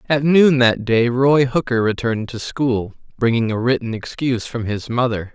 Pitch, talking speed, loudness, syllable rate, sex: 120 Hz, 180 wpm, -18 LUFS, 4.9 syllables/s, male